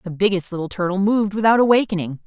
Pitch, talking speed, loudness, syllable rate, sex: 195 Hz, 185 wpm, -19 LUFS, 7.1 syllables/s, female